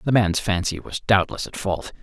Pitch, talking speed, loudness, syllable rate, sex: 100 Hz, 205 wpm, -22 LUFS, 4.9 syllables/s, male